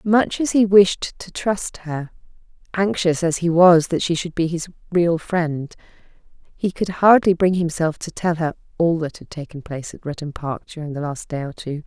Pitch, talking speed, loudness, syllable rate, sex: 170 Hz, 200 wpm, -20 LUFS, 4.7 syllables/s, female